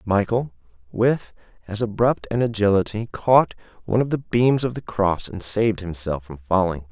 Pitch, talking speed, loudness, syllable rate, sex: 100 Hz, 165 wpm, -22 LUFS, 4.9 syllables/s, male